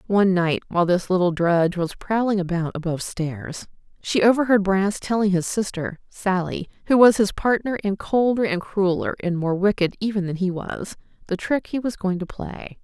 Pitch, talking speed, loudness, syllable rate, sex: 190 Hz, 185 wpm, -22 LUFS, 4.0 syllables/s, female